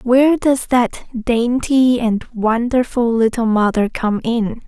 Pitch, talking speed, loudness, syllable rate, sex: 235 Hz, 130 wpm, -16 LUFS, 3.6 syllables/s, female